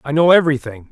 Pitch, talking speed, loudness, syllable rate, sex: 145 Hz, 195 wpm, -14 LUFS, 7.4 syllables/s, male